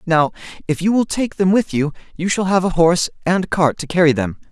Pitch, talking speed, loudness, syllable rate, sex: 170 Hz, 240 wpm, -17 LUFS, 5.7 syllables/s, male